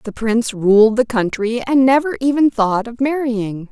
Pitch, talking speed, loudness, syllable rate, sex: 235 Hz, 180 wpm, -16 LUFS, 4.5 syllables/s, female